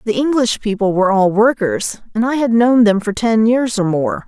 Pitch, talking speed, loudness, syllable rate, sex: 220 Hz, 225 wpm, -15 LUFS, 5.0 syllables/s, female